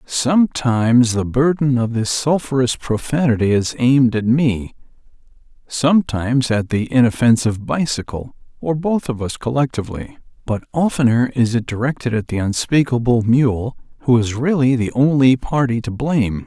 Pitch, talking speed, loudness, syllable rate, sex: 125 Hz, 140 wpm, -17 LUFS, 5.0 syllables/s, male